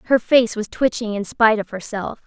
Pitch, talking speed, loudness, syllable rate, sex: 220 Hz, 210 wpm, -19 LUFS, 5.5 syllables/s, female